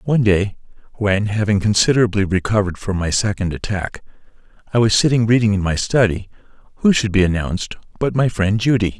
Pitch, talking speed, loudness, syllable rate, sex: 105 Hz, 165 wpm, -18 LUFS, 6.0 syllables/s, male